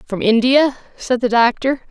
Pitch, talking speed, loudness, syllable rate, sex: 245 Hz, 155 wpm, -16 LUFS, 4.4 syllables/s, female